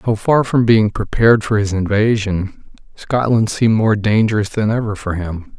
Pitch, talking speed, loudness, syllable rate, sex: 110 Hz, 170 wpm, -16 LUFS, 4.8 syllables/s, male